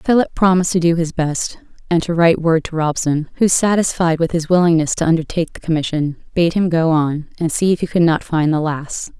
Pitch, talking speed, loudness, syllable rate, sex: 165 Hz, 220 wpm, -17 LUFS, 5.7 syllables/s, female